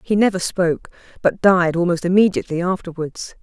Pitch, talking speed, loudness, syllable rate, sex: 180 Hz, 140 wpm, -19 LUFS, 5.8 syllables/s, female